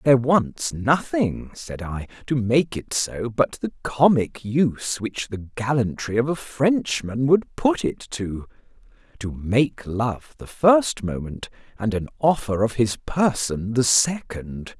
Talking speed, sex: 145 wpm, male